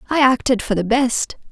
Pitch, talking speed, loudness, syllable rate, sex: 245 Hz, 200 wpm, -18 LUFS, 5.0 syllables/s, female